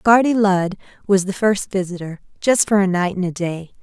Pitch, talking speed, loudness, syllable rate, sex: 195 Hz, 205 wpm, -18 LUFS, 4.9 syllables/s, female